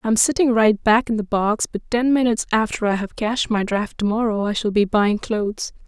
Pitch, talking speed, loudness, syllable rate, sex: 220 Hz, 235 wpm, -20 LUFS, 5.4 syllables/s, female